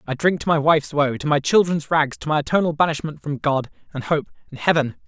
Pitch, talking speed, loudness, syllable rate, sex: 150 Hz, 235 wpm, -20 LUFS, 6.1 syllables/s, male